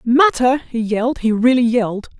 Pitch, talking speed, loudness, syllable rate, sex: 240 Hz, 165 wpm, -16 LUFS, 5.3 syllables/s, female